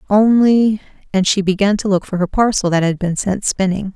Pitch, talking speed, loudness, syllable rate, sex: 195 Hz, 210 wpm, -16 LUFS, 5.3 syllables/s, female